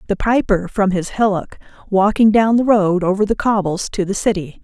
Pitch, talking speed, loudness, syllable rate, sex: 200 Hz, 195 wpm, -16 LUFS, 5.1 syllables/s, female